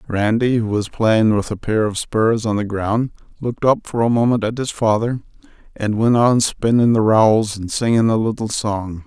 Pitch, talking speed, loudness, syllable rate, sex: 110 Hz, 205 wpm, -18 LUFS, 4.9 syllables/s, male